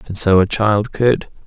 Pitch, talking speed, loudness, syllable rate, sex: 105 Hz, 205 wpm, -16 LUFS, 4.2 syllables/s, male